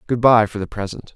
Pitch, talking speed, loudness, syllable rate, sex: 110 Hz, 260 wpm, -18 LUFS, 6.1 syllables/s, male